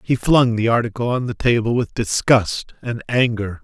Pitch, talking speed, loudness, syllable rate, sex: 115 Hz, 180 wpm, -19 LUFS, 4.7 syllables/s, male